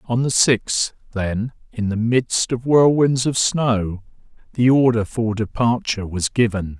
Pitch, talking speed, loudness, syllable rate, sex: 115 Hz, 150 wpm, -19 LUFS, 4.0 syllables/s, male